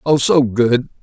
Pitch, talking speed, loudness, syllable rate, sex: 125 Hz, 175 wpm, -15 LUFS, 3.7 syllables/s, male